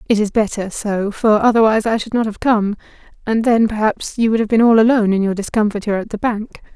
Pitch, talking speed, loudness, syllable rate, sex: 215 Hz, 230 wpm, -16 LUFS, 6.2 syllables/s, female